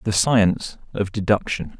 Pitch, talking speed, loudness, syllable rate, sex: 100 Hz, 135 wpm, -21 LUFS, 4.6 syllables/s, male